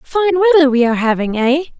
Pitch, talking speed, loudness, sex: 290 Hz, 200 wpm, -13 LUFS, female